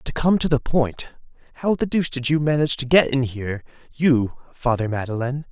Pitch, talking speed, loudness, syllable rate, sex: 135 Hz, 205 wpm, -21 LUFS, 6.0 syllables/s, male